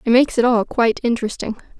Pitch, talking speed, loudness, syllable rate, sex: 235 Hz, 200 wpm, -18 LUFS, 7.3 syllables/s, female